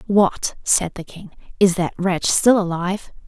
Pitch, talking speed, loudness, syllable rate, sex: 185 Hz, 165 wpm, -19 LUFS, 4.1 syllables/s, female